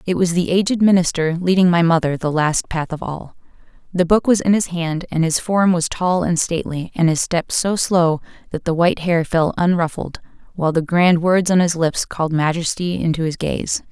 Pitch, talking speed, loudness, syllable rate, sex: 170 Hz, 210 wpm, -18 LUFS, 5.2 syllables/s, female